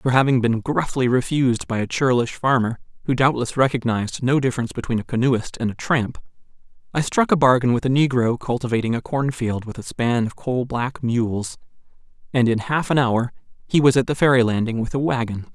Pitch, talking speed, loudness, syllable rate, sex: 125 Hz, 195 wpm, -21 LUFS, 5.7 syllables/s, male